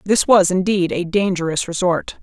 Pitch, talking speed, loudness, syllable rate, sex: 185 Hz, 160 wpm, -17 LUFS, 4.7 syllables/s, female